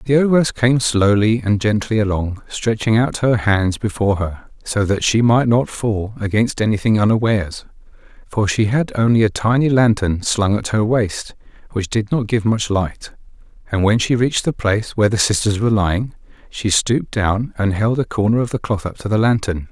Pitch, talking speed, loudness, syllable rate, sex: 110 Hz, 195 wpm, -17 LUFS, 5.1 syllables/s, male